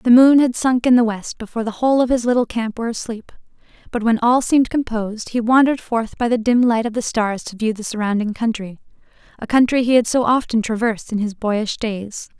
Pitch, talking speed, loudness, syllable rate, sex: 230 Hz, 225 wpm, -18 LUFS, 5.8 syllables/s, female